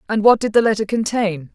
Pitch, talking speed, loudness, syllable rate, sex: 210 Hz, 230 wpm, -17 LUFS, 5.9 syllables/s, female